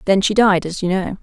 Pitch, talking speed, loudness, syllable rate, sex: 195 Hz, 295 wpm, -17 LUFS, 5.7 syllables/s, female